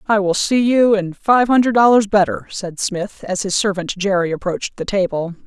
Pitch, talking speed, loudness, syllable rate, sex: 200 Hz, 200 wpm, -17 LUFS, 5.1 syllables/s, female